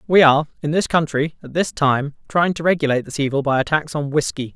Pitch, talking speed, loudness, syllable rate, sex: 150 Hz, 235 wpm, -19 LUFS, 6.1 syllables/s, male